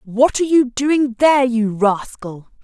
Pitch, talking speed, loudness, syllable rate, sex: 245 Hz, 160 wpm, -16 LUFS, 4.1 syllables/s, female